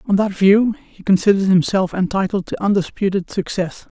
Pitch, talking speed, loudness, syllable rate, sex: 190 Hz, 150 wpm, -18 LUFS, 5.5 syllables/s, male